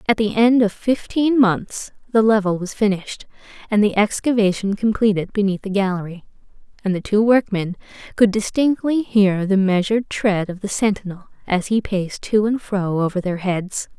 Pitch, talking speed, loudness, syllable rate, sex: 205 Hz, 165 wpm, -19 LUFS, 5.0 syllables/s, female